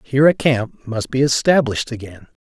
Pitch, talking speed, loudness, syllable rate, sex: 125 Hz, 175 wpm, -18 LUFS, 5.5 syllables/s, male